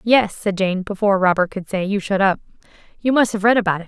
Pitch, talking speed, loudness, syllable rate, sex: 200 Hz, 250 wpm, -19 LUFS, 6.2 syllables/s, female